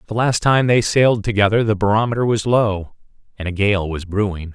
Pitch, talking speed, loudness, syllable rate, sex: 105 Hz, 200 wpm, -17 LUFS, 5.6 syllables/s, male